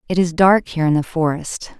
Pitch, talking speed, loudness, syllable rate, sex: 170 Hz, 235 wpm, -17 LUFS, 5.6 syllables/s, female